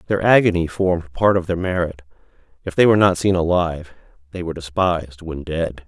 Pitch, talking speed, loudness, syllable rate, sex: 85 Hz, 175 wpm, -19 LUFS, 6.0 syllables/s, male